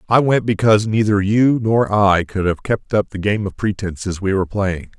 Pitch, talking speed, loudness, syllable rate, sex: 105 Hz, 215 wpm, -17 LUFS, 5.1 syllables/s, male